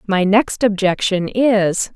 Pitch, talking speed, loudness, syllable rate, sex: 205 Hz, 125 wpm, -16 LUFS, 3.3 syllables/s, female